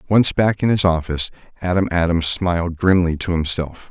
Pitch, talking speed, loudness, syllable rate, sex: 90 Hz, 170 wpm, -19 LUFS, 5.3 syllables/s, male